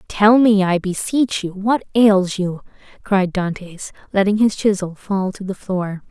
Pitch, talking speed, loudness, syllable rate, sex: 195 Hz, 165 wpm, -18 LUFS, 4.0 syllables/s, female